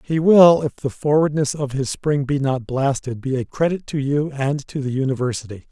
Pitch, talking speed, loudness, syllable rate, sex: 140 Hz, 210 wpm, -20 LUFS, 5.1 syllables/s, male